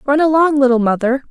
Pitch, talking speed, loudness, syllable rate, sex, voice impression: 270 Hz, 185 wpm, -14 LUFS, 6.0 syllables/s, female, slightly gender-neutral, slightly young, slightly muffled, calm, kind, slightly modest